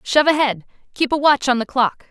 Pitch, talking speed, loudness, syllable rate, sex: 265 Hz, 230 wpm, -17 LUFS, 5.7 syllables/s, female